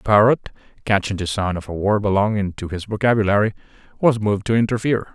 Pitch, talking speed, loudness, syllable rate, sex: 105 Hz, 185 wpm, -20 LUFS, 6.5 syllables/s, male